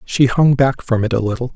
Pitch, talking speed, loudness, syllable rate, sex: 125 Hz, 270 wpm, -16 LUFS, 5.5 syllables/s, male